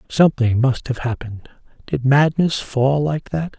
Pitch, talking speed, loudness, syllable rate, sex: 135 Hz, 150 wpm, -19 LUFS, 4.6 syllables/s, male